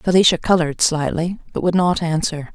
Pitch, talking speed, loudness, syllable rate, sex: 165 Hz, 165 wpm, -18 LUFS, 5.5 syllables/s, female